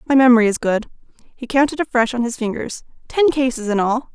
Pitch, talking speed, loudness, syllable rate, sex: 245 Hz, 175 wpm, -18 LUFS, 6.2 syllables/s, female